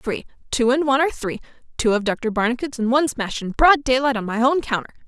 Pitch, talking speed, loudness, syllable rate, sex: 245 Hz, 215 wpm, -20 LUFS, 6.7 syllables/s, female